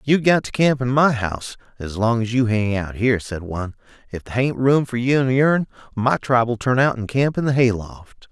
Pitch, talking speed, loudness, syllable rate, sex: 120 Hz, 245 wpm, -19 LUFS, 5.2 syllables/s, male